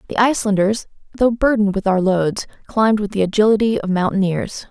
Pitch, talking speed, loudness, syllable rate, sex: 205 Hz, 165 wpm, -17 LUFS, 6.0 syllables/s, female